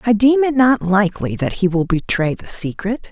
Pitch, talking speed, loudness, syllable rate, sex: 205 Hz, 210 wpm, -17 LUFS, 5.0 syllables/s, female